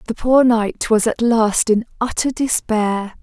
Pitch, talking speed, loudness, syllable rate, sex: 225 Hz, 170 wpm, -17 LUFS, 3.8 syllables/s, female